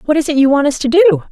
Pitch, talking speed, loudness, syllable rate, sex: 290 Hz, 365 wpm, -12 LUFS, 7.1 syllables/s, female